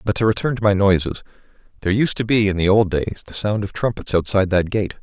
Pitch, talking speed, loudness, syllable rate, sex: 100 Hz, 250 wpm, -19 LUFS, 6.6 syllables/s, male